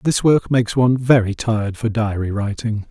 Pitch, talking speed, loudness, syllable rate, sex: 110 Hz, 185 wpm, -18 LUFS, 5.4 syllables/s, male